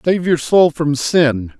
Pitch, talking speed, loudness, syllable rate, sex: 150 Hz, 190 wpm, -15 LUFS, 3.4 syllables/s, male